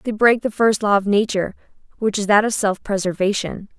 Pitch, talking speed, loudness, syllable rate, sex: 205 Hz, 205 wpm, -19 LUFS, 5.7 syllables/s, female